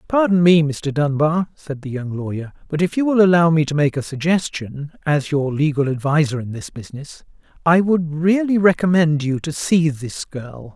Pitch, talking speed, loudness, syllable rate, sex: 155 Hz, 190 wpm, -18 LUFS, 4.8 syllables/s, male